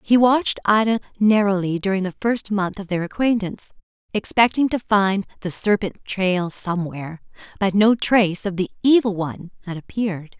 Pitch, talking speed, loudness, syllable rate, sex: 200 Hz, 155 wpm, -20 LUFS, 5.3 syllables/s, female